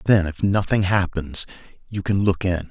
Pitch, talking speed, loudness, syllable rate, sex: 95 Hz, 175 wpm, -22 LUFS, 4.7 syllables/s, male